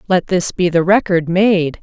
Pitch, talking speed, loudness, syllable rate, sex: 180 Hz, 195 wpm, -15 LUFS, 4.2 syllables/s, female